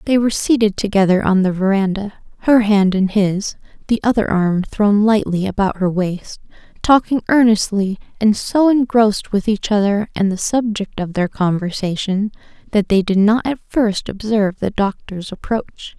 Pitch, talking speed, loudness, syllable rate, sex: 205 Hz, 160 wpm, -17 LUFS, 4.7 syllables/s, female